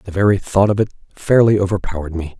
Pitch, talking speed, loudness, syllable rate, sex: 95 Hz, 200 wpm, -17 LUFS, 6.6 syllables/s, male